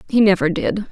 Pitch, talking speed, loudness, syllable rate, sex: 195 Hz, 195 wpm, -17 LUFS, 5.6 syllables/s, female